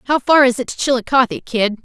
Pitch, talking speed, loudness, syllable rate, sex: 250 Hz, 230 wpm, -15 LUFS, 7.0 syllables/s, female